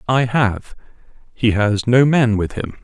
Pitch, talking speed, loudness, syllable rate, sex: 115 Hz, 170 wpm, -17 LUFS, 4.0 syllables/s, male